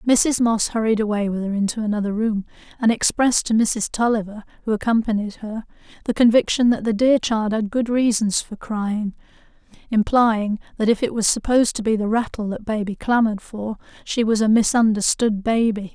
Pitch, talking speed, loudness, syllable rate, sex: 220 Hz, 175 wpm, -20 LUFS, 5.4 syllables/s, female